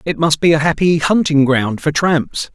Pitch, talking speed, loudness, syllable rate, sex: 155 Hz, 210 wpm, -14 LUFS, 4.6 syllables/s, male